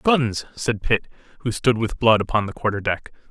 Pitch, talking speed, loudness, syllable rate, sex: 115 Hz, 200 wpm, -22 LUFS, 5.0 syllables/s, male